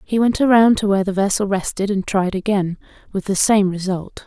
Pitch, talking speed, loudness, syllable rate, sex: 200 Hz, 210 wpm, -18 LUFS, 5.5 syllables/s, female